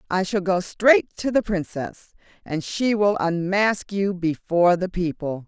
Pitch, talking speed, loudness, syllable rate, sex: 185 Hz, 165 wpm, -22 LUFS, 4.3 syllables/s, female